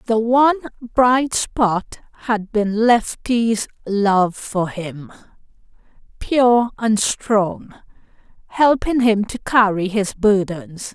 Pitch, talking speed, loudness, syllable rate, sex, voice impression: 220 Hz, 105 wpm, -18 LUFS, 3.0 syllables/s, female, feminine, middle-aged, powerful, muffled, halting, raspy, slightly friendly, slightly reassuring, strict, sharp